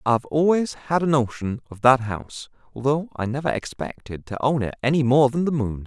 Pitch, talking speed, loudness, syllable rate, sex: 135 Hz, 205 wpm, -22 LUFS, 5.5 syllables/s, male